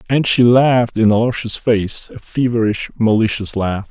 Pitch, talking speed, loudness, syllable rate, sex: 115 Hz, 155 wpm, -16 LUFS, 4.7 syllables/s, male